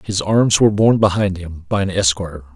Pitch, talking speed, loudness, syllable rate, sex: 95 Hz, 210 wpm, -16 LUFS, 6.0 syllables/s, male